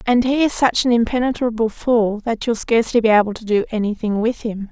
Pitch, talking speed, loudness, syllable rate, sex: 230 Hz, 215 wpm, -18 LUFS, 5.7 syllables/s, female